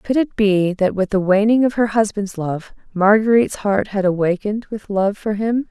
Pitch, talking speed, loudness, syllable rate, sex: 205 Hz, 200 wpm, -18 LUFS, 4.9 syllables/s, female